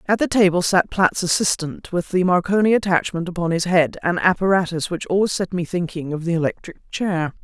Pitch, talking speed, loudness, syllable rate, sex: 180 Hz, 185 wpm, -20 LUFS, 5.4 syllables/s, female